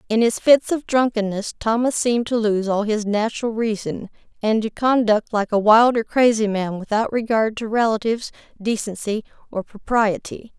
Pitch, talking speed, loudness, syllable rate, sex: 220 Hz, 165 wpm, -20 LUFS, 5.0 syllables/s, female